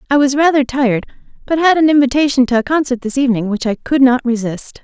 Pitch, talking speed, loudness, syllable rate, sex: 260 Hz, 225 wpm, -14 LUFS, 6.4 syllables/s, female